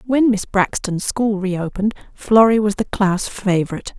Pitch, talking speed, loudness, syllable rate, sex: 205 Hz, 150 wpm, -18 LUFS, 4.7 syllables/s, female